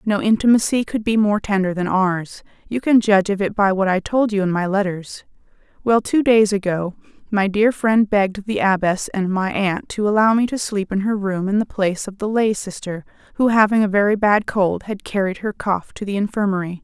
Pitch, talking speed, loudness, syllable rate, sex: 200 Hz, 220 wpm, -19 LUFS, 5.3 syllables/s, female